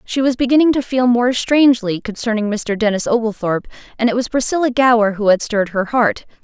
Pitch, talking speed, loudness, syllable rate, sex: 230 Hz, 195 wpm, -16 LUFS, 6.0 syllables/s, female